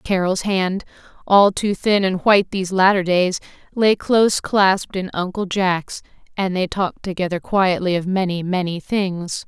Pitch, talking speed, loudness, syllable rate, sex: 190 Hz, 160 wpm, -19 LUFS, 4.1 syllables/s, female